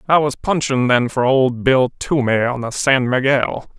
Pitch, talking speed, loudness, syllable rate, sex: 130 Hz, 190 wpm, -17 LUFS, 4.4 syllables/s, male